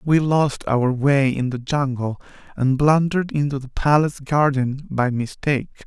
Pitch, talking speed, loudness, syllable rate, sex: 140 Hz, 155 wpm, -20 LUFS, 4.6 syllables/s, male